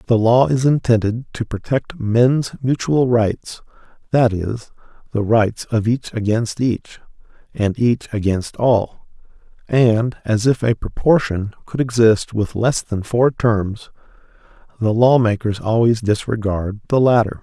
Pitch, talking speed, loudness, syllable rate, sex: 115 Hz, 135 wpm, -18 LUFS, 3.9 syllables/s, male